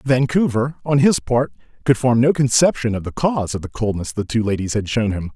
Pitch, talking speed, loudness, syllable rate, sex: 120 Hz, 225 wpm, -19 LUFS, 5.6 syllables/s, male